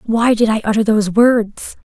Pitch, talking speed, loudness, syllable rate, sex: 220 Hz, 190 wpm, -14 LUFS, 4.7 syllables/s, female